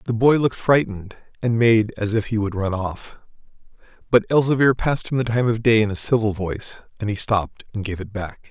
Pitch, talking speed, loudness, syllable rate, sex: 110 Hz, 220 wpm, -21 LUFS, 5.8 syllables/s, male